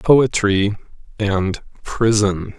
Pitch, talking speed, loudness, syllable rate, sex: 105 Hz, 70 wpm, -18 LUFS, 2.6 syllables/s, male